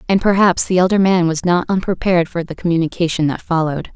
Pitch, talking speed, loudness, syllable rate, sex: 175 Hz, 195 wpm, -16 LUFS, 6.4 syllables/s, female